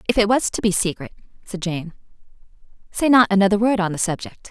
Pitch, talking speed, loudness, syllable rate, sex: 205 Hz, 200 wpm, -19 LUFS, 6.3 syllables/s, female